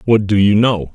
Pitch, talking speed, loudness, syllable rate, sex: 105 Hz, 255 wpm, -13 LUFS, 4.9 syllables/s, male